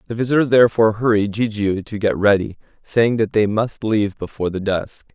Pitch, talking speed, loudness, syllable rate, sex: 110 Hz, 185 wpm, -18 LUFS, 5.8 syllables/s, male